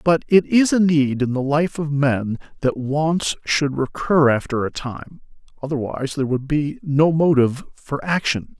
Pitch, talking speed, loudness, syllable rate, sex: 145 Hz, 175 wpm, -20 LUFS, 4.5 syllables/s, male